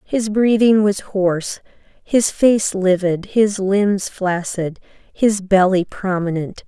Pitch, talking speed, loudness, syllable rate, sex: 195 Hz, 115 wpm, -17 LUFS, 3.4 syllables/s, female